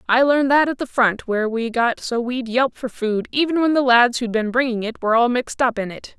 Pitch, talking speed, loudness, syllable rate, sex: 245 Hz, 270 wpm, -19 LUFS, 5.7 syllables/s, female